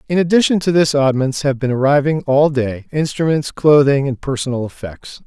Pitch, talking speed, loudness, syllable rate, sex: 140 Hz, 160 wpm, -16 LUFS, 5.2 syllables/s, male